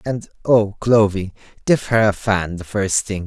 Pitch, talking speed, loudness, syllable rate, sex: 105 Hz, 185 wpm, -18 LUFS, 4.2 syllables/s, male